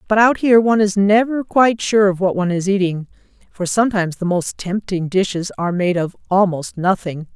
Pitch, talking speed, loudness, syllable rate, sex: 195 Hz, 195 wpm, -17 LUFS, 5.8 syllables/s, female